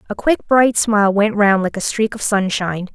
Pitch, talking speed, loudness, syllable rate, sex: 210 Hz, 225 wpm, -16 LUFS, 5.2 syllables/s, female